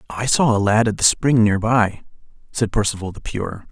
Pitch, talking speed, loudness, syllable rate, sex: 110 Hz, 210 wpm, -18 LUFS, 5.0 syllables/s, male